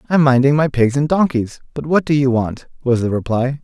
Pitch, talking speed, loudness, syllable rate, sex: 135 Hz, 230 wpm, -16 LUFS, 5.4 syllables/s, male